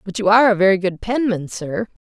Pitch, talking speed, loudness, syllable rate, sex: 200 Hz, 235 wpm, -17 LUFS, 6.0 syllables/s, female